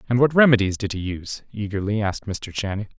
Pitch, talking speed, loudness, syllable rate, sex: 105 Hz, 200 wpm, -22 LUFS, 6.4 syllables/s, male